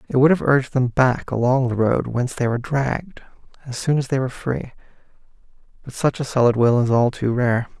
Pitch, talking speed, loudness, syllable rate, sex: 130 Hz, 215 wpm, -20 LUFS, 5.8 syllables/s, male